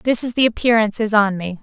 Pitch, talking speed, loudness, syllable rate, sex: 220 Hz, 260 wpm, -16 LUFS, 6.3 syllables/s, female